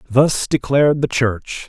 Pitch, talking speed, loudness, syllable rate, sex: 130 Hz, 145 wpm, -17 LUFS, 4.0 syllables/s, male